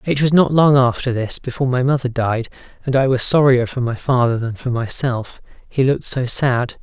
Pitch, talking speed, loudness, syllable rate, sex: 125 Hz, 200 wpm, -17 LUFS, 5.3 syllables/s, male